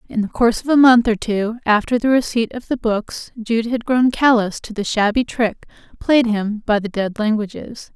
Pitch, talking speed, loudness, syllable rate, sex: 225 Hz, 210 wpm, -18 LUFS, 4.8 syllables/s, female